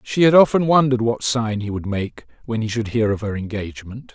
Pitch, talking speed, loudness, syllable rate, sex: 115 Hz, 230 wpm, -19 LUFS, 5.7 syllables/s, male